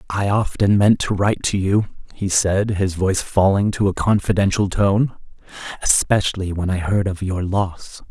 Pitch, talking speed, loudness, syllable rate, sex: 95 Hz, 170 wpm, -19 LUFS, 4.7 syllables/s, male